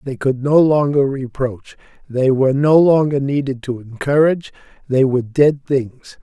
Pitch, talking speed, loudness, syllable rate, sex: 135 Hz, 155 wpm, -16 LUFS, 4.6 syllables/s, male